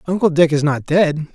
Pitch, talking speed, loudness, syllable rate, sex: 160 Hz, 225 wpm, -16 LUFS, 5.5 syllables/s, male